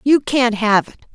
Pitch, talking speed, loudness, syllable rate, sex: 235 Hz, 210 wpm, -16 LUFS, 4.6 syllables/s, female